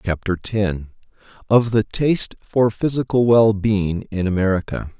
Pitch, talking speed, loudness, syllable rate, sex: 105 Hz, 120 wpm, -19 LUFS, 4.3 syllables/s, male